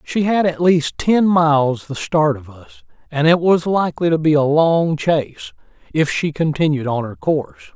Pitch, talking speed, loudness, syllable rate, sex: 150 Hz, 195 wpm, -17 LUFS, 4.8 syllables/s, male